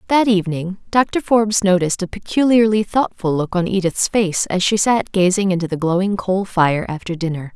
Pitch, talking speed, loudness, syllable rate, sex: 190 Hz, 185 wpm, -17 LUFS, 5.4 syllables/s, female